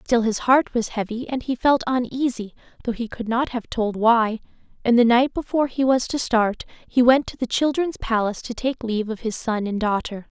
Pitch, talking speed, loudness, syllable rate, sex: 235 Hz, 220 wpm, -22 LUFS, 5.3 syllables/s, female